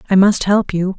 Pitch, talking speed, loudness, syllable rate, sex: 195 Hz, 245 wpm, -15 LUFS, 5.1 syllables/s, female